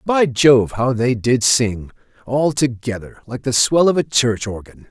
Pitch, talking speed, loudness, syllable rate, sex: 125 Hz, 170 wpm, -17 LUFS, 4.1 syllables/s, male